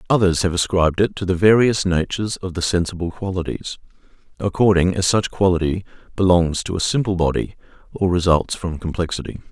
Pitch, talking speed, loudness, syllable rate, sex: 90 Hz, 160 wpm, -19 LUFS, 5.8 syllables/s, male